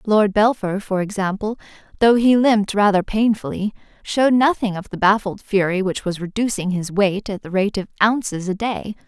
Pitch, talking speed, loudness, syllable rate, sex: 205 Hz, 180 wpm, -19 LUFS, 5.2 syllables/s, female